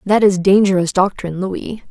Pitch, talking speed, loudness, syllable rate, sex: 190 Hz, 155 wpm, -16 LUFS, 5.2 syllables/s, female